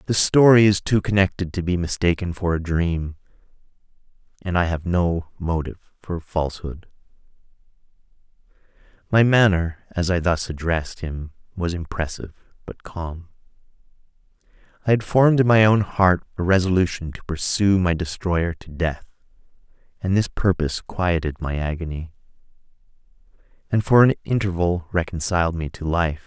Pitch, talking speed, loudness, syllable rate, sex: 90 Hz, 130 wpm, -21 LUFS, 5.1 syllables/s, male